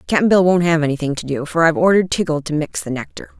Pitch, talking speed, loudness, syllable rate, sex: 160 Hz, 265 wpm, -17 LUFS, 6.8 syllables/s, female